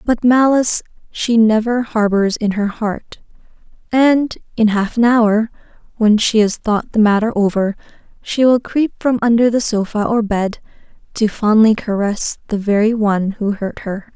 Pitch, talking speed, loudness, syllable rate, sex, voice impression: 220 Hz, 160 wpm, -16 LUFS, 4.5 syllables/s, female, very feminine, slightly young, thin, slightly tensed, slightly weak, slightly bright, slightly soft, clear, slightly fluent, cute, slightly intellectual, refreshing, sincere, very calm, very friendly, reassuring, slightly unique, elegant, slightly wild, sweet, slightly lively, kind, modest, light